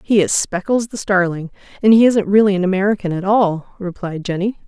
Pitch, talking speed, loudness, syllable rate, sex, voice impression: 195 Hz, 190 wpm, -16 LUFS, 5.5 syllables/s, female, feminine, slightly gender-neutral, young, slightly adult-like, thin, tensed, slightly weak, bright, hard, clear, fluent, cute, intellectual, slightly refreshing, slightly sincere, calm, slightly friendly, slightly elegant, slightly sweet, kind, slightly modest